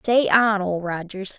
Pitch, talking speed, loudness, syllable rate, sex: 200 Hz, 175 wpm, -20 LUFS, 3.9 syllables/s, female